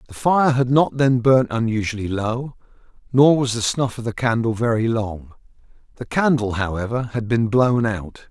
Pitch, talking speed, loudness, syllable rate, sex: 120 Hz, 175 wpm, -20 LUFS, 4.7 syllables/s, male